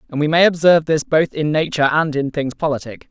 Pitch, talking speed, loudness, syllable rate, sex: 150 Hz, 230 wpm, -17 LUFS, 6.2 syllables/s, male